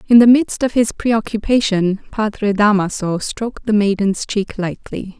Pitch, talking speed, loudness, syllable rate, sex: 210 Hz, 150 wpm, -17 LUFS, 4.5 syllables/s, female